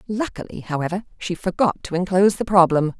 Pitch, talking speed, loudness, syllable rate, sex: 185 Hz, 160 wpm, -20 LUFS, 6.0 syllables/s, female